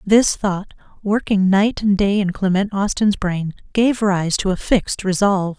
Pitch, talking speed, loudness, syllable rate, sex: 195 Hz, 170 wpm, -18 LUFS, 4.4 syllables/s, female